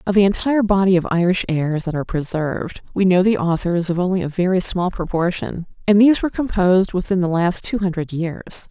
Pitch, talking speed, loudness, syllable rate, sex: 185 Hz, 205 wpm, -19 LUFS, 6.0 syllables/s, female